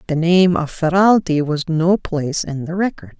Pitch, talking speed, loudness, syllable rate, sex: 170 Hz, 190 wpm, -17 LUFS, 4.7 syllables/s, female